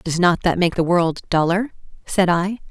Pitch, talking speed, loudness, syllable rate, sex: 175 Hz, 200 wpm, -19 LUFS, 4.6 syllables/s, female